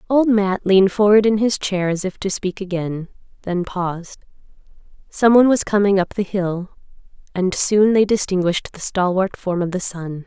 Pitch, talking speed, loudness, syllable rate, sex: 195 Hz, 175 wpm, -18 LUFS, 5.0 syllables/s, female